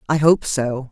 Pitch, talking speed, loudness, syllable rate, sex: 140 Hz, 195 wpm, -18 LUFS, 4.1 syllables/s, female